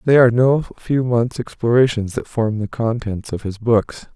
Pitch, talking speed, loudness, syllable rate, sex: 115 Hz, 190 wpm, -18 LUFS, 4.7 syllables/s, male